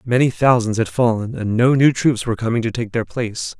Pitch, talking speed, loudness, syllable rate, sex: 120 Hz, 235 wpm, -18 LUFS, 5.8 syllables/s, male